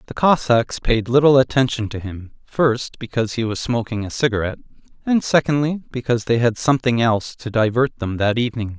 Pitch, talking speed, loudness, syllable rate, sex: 120 Hz, 180 wpm, -19 LUFS, 5.8 syllables/s, male